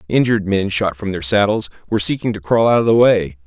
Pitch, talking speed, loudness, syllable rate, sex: 100 Hz, 245 wpm, -16 LUFS, 6.3 syllables/s, male